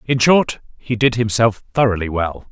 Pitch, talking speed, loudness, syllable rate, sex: 110 Hz, 165 wpm, -17 LUFS, 4.7 syllables/s, male